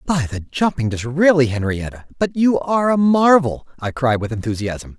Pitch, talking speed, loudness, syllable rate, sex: 140 Hz, 170 wpm, -18 LUFS, 5.0 syllables/s, male